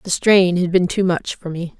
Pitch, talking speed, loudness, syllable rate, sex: 180 Hz, 265 wpm, -17 LUFS, 4.9 syllables/s, female